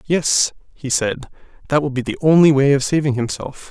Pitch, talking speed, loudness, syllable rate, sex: 140 Hz, 195 wpm, -17 LUFS, 5.2 syllables/s, male